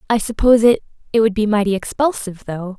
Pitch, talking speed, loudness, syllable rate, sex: 215 Hz, 170 wpm, -17 LUFS, 6.1 syllables/s, female